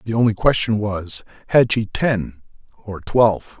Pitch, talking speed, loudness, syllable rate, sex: 105 Hz, 150 wpm, -19 LUFS, 4.4 syllables/s, male